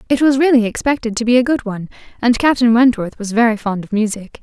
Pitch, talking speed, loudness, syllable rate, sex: 235 Hz, 230 wpm, -15 LUFS, 6.4 syllables/s, female